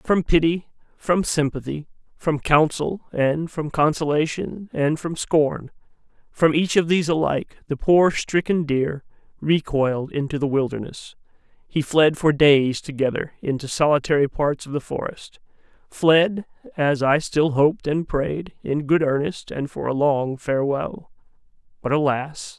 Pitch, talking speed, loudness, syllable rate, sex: 150 Hz, 140 wpm, -21 LUFS, 4.3 syllables/s, male